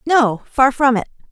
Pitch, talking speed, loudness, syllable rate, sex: 255 Hz, 185 wpm, -16 LUFS, 4.4 syllables/s, female